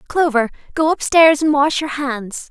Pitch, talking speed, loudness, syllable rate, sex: 290 Hz, 190 wpm, -16 LUFS, 4.3 syllables/s, female